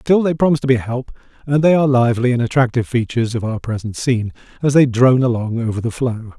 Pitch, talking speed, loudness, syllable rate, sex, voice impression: 125 Hz, 235 wpm, -17 LUFS, 7.0 syllables/s, male, very masculine, old, very thick, slightly relaxed, powerful, bright, very soft, very muffled, fluent, raspy, cool, very intellectual, slightly refreshing, very sincere, very calm, very mature, very friendly, very reassuring, very unique, very elegant, wild, sweet, lively, very kind, slightly modest